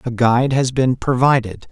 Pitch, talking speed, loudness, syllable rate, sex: 125 Hz, 175 wpm, -16 LUFS, 5.0 syllables/s, male